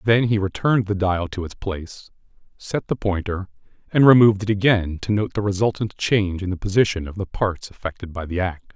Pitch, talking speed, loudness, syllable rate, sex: 100 Hz, 205 wpm, -21 LUFS, 5.7 syllables/s, male